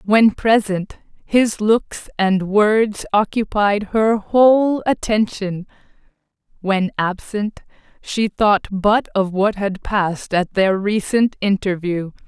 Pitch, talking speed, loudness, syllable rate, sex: 205 Hz, 110 wpm, -18 LUFS, 3.4 syllables/s, female